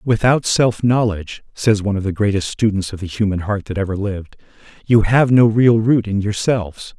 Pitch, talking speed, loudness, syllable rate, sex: 105 Hz, 200 wpm, -17 LUFS, 5.3 syllables/s, male